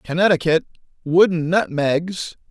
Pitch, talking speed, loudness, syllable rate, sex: 165 Hz, 70 wpm, -19 LUFS, 4.3 syllables/s, male